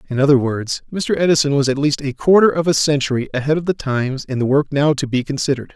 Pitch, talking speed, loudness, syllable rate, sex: 140 Hz, 250 wpm, -17 LUFS, 6.5 syllables/s, male